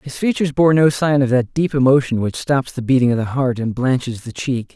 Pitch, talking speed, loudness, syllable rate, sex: 130 Hz, 250 wpm, -17 LUFS, 5.5 syllables/s, male